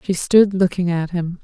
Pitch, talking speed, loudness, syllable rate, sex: 180 Hz, 210 wpm, -17 LUFS, 4.5 syllables/s, female